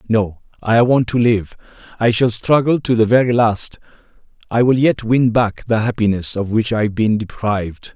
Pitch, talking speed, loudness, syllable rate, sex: 110 Hz, 190 wpm, -16 LUFS, 4.8 syllables/s, male